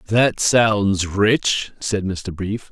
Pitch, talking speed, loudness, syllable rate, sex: 105 Hz, 135 wpm, -19 LUFS, 2.5 syllables/s, male